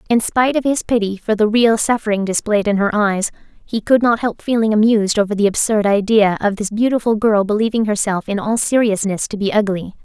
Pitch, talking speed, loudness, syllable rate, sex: 215 Hz, 210 wpm, -16 LUFS, 5.7 syllables/s, female